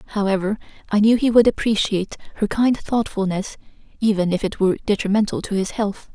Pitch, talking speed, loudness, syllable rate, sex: 210 Hz, 165 wpm, -20 LUFS, 5.7 syllables/s, female